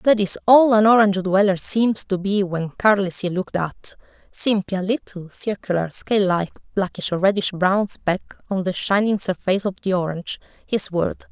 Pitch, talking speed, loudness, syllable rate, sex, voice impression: 195 Hz, 175 wpm, -20 LUFS, 5.0 syllables/s, female, feminine, slightly adult-like, slightly soft, slightly calm, slightly sweet